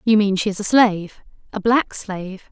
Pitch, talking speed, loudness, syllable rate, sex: 205 Hz, 190 wpm, -19 LUFS, 5.5 syllables/s, female